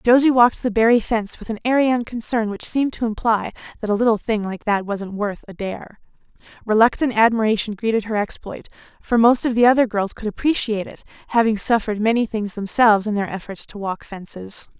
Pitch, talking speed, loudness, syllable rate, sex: 220 Hz, 195 wpm, -20 LUFS, 6.0 syllables/s, female